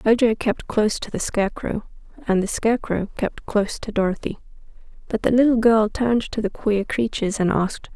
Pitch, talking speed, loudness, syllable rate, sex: 215 Hz, 180 wpm, -22 LUFS, 5.8 syllables/s, female